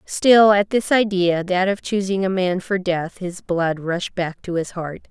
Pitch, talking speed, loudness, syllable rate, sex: 185 Hz, 210 wpm, -19 LUFS, 4.0 syllables/s, female